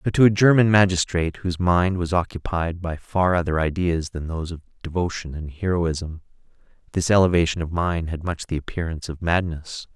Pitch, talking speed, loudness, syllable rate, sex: 85 Hz, 175 wpm, -22 LUFS, 5.6 syllables/s, male